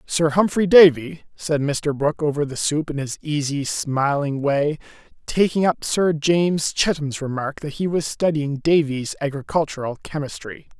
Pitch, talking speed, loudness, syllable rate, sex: 150 Hz, 150 wpm, -20 LUFS, 4.5 syllables/s, male